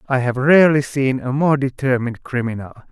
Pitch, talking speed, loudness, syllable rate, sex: 135 Hz, 165 wpm, -17 LUFS, 5.4 syllables/s, male